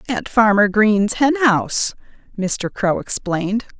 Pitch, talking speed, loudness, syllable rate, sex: 215 Hz, 125 wpm, -17 LUFS, 3.9 syllables/s, female